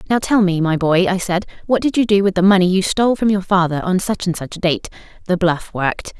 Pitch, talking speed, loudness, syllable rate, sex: 190 Hz, 270 wpm, -17 LUFS, 6.1 syllables/s, female